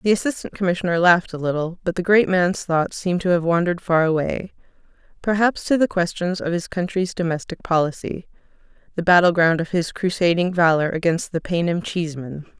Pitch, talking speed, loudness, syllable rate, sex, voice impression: 175 Hz, 175 wpm, -20 LUFS, 5.7 syllables/s, female, feminine, very adult-like, slightly cool, slightly calm